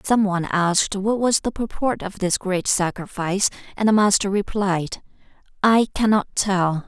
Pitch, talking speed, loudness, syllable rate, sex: 200 Hz, 155 wpm, -21 LUFS, 4.6 syllables/s, female